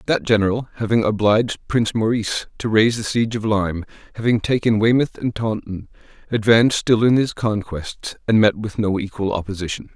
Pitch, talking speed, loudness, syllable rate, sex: 110 Hz, 170 wpm, -19 LUFS, 5.7 syllables/s, male